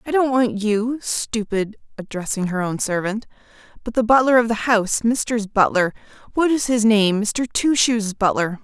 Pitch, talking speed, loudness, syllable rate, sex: 225 Hz, 165 wpm, -19 LUFS, 4.2 syllables/s, female